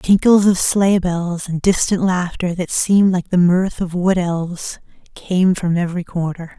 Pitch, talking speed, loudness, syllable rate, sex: 180 Hz, 175 wpm, -17 LUFS, 4.4 syllables/s, female